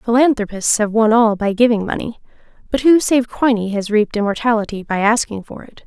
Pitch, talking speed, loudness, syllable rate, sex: 225 Hz, 185 wpm, -16 LUFS, 5.7 syllables/s, female